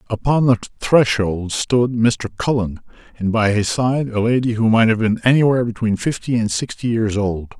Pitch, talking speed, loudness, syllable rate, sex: 115 Hz, 180 wpm, -18 LUFS, 5.0 syllables/s, male